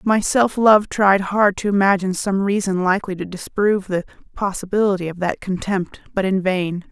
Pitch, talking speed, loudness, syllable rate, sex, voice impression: 195 Hz, 175 wpm, -19 LUFS, 5.2 syllables/s, female, very feminine, slightly young, adult-like, very thin, slightly tensed, slightly weak, bright, hard, slightly muffled, fluent, slightly raspy, cute, intellectual, very refreshing, sincere, very calm, friendly, reassuring, very unique, elegant, slightly wild, very sweet, slightly lively, very kind, very modest, light